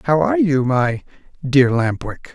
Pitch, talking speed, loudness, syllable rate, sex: 140 Hz, 180 wpm, -17 LUFS, 4.4 syllables/s, male